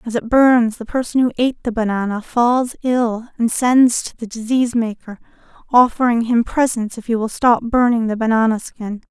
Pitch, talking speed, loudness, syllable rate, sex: 235 Hz, 185 wpm, -17 LUFS, 5.0 syllables/s, female